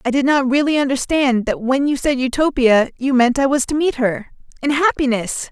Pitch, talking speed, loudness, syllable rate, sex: 265 Hz, 195 wpm, -17 LUFS, 5.2 syllables/s, female